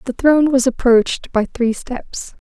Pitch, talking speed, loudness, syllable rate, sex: 250 Hz, 170 wpm, -16 LUFS, 4.5 syllables/s, female